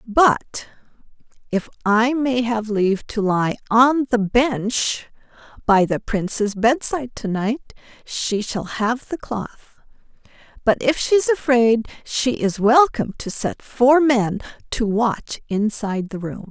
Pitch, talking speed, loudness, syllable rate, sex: 230 Hz, 140 wpm, -20 LUFS, 3.6 syllables/s, female